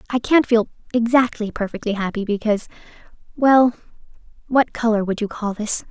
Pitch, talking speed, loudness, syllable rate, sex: 225 Hz, 130 wpm, -19 LUFS, 5.5 syllables/s, female